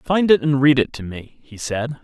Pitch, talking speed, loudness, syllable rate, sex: 135 Hz, 265 wpm, -18 LUFS, 4.6 syllables/s, male